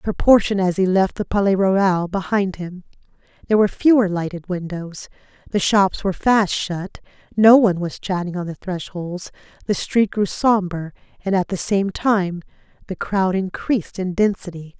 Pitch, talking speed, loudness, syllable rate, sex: 190 Hz, 165 wpm, -19 LUFS, 4.9 syllables/s, female